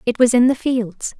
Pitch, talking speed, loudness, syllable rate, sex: 245 Hz, 250 wpm, -17 LUFS, 4.7 syllables/s, female